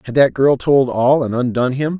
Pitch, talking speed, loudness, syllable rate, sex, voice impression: 130 Hz, 240 wpm, -15 LUFS, 5.5 syllables/s, male, masculine, very adult-like, slightly intellectual, sincere, slightly calm, slightly wild